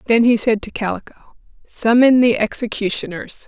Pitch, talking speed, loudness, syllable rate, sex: 225 Hz, 140 wpm, -17 LUFS, 5.0 syllables/s, female